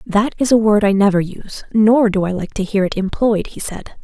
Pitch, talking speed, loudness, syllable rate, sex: 205 Hz, 255 wpm, -16 LUFS, 5.3 syllables/s, female